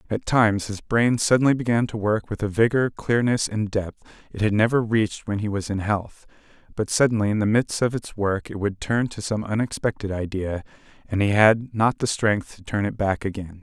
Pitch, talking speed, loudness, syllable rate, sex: 105 Hz, 215 wpm, -23 LUFS, 5.3 syllables/s, male